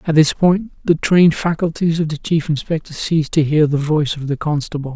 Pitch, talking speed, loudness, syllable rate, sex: 155 Hz, 220 wpm, -17 LUFS, 5.7 syllables/s, male